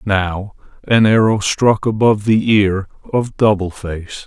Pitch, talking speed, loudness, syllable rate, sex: 105 Hz, 140 wpm, -15 LUFS, 3.8 syllables/s, male